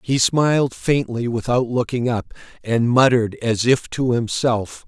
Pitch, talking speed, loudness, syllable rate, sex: 120 Hz, 150 wpm, -19 LUFS, 4.2 syllables/s, male